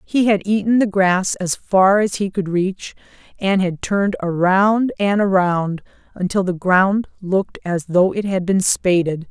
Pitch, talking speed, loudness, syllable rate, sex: 190 Hz, 175 wpm, -18 LUFS, 4.2 syllables/s, female